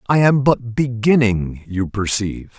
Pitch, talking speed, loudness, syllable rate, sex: 115 Hz, 140 wpm, -18 LUFS, 4.4 syllables/s, male